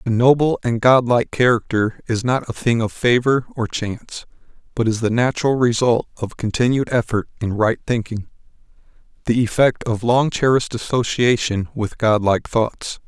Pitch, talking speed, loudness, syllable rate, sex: 115 Hz, 150 wpm, -19 LUFS, 5.0 syllables/s, male